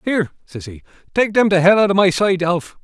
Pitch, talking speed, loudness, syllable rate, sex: 185 Hz, 255 wpm, -16 LUFS, 5.8 syllables/s, male